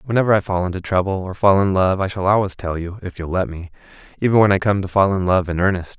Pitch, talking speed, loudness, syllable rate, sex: 95 Hz, 270 wpm, -18 LUFS, 6.6 syllables/s, male